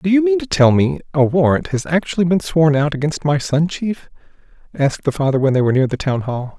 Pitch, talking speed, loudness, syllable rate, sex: 155 Hz, 245 wpm, -17 LUFS, 5.9 syllables/s, male